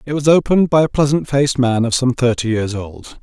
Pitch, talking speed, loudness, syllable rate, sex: 130 Hz, 240 wpm, -15 LUFS, 5.8 syllables/s, male